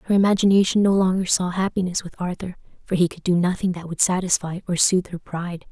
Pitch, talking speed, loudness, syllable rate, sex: 180 Hz, 210 wpm, -21 LUFS, 6.4 syllables/s, female